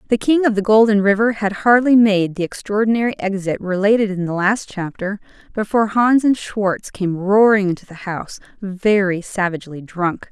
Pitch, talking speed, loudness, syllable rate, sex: 205 Hz, 170 wpm, -17 LUFS, 5.1 syllables/s, female